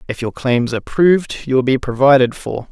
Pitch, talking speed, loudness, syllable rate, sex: 130 Hz, 220 wpm, -16 LUFS, 5.8 syllables/s, male